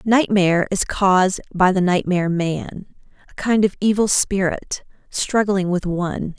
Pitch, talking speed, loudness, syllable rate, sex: 190 Hz, 140 wpm, -19 LUFS, 4.4 syllables/s, female